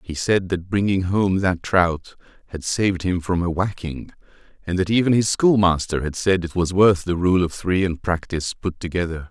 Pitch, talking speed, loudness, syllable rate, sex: 90 Hz, 205 wpm, -21 LUFS, 5.0 syllables/s, male